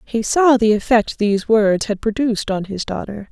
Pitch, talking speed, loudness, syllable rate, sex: 220 Hz, 200 wpm, -17 LUFS, 5.0 syllables/s, female